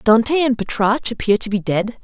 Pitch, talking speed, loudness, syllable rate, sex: 230 Hz, 205 wpm, -18 LUFS, 5.2 syllables/s, female